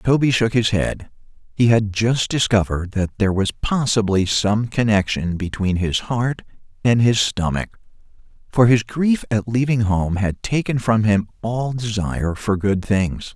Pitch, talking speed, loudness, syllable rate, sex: 110 Hz, 155 wpm, -19 LUFS, 4.4 syllables/s, male